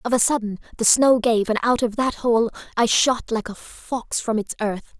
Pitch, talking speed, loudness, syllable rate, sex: 230 Hz, 230 wpm, -21 LUFS, 4.7 syllables/s, female